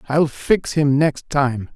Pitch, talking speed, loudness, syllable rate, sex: 145 Hz, 170 wpm, -19 LUFS, 3.3 syllables/s, male